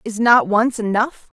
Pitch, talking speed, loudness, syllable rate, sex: 225 Hz, 175 wpm, -17 LUFS, 4.3 syllables/s, female